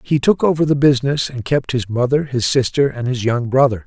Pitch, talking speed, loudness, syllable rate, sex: 130 Hz, 235 wpm, -17 LUFS, 5.6 syllables/s, male